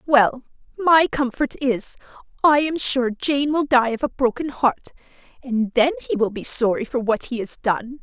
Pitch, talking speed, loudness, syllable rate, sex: 255 Hz, 185 wpm, -20 LUFS, 4.6 syllables/s, female